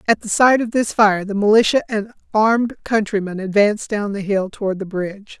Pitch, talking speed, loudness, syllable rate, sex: 210 Hz, 200 wpm, -18 LUFS, 5.5 syllables/s, female